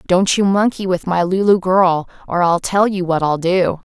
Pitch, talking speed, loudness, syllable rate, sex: 185 Hz, 215 wpm, -16 LUFS, 4.6 syllables/s, female